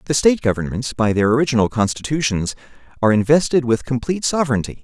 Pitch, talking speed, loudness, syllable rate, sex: 130 Hz, 150 wpm, -18 LUFS, 6.9 syllables/s, male